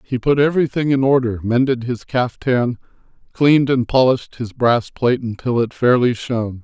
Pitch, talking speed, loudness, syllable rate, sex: 125 Hz, 165 wpm, -17 LUFS, 5.3 syllables/s, male